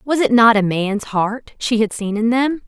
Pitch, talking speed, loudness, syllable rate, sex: 230 Hz, 245 wpm, -17 LUFS, 4.3 syllables/s, female